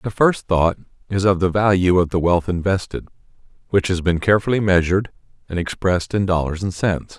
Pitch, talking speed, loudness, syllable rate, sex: 95 Hz, 185 wpm, -19 LUFS, 5.7 syllables/s, male